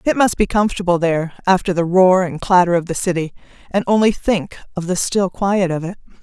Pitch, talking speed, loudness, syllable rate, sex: 185 Hz, 210 wpm, -17 LUFS, 5.8 syllables/s, female